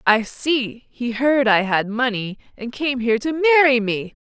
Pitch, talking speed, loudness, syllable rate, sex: 245 Hz, 185 wpm, -19 LUFS, 4.4 syllables/s, female